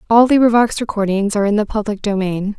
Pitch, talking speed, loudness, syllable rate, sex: 210 Hz, 185 wpm, -16 LUFS, 6.4 syllables/s, female